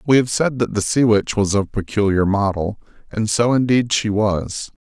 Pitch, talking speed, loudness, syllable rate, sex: 110 Hz, 200 wpm, -18 LUFS, 4.7 syllables/s, male